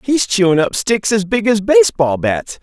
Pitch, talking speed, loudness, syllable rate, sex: 185 Hz, 205 wpm, -14 LUFS, 4.7 syllables/s, male